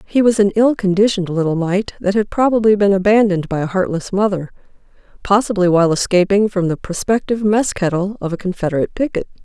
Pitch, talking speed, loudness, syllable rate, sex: 195 Hz, 180 wpm, -16 LUFS, 6.3 syllables/s, female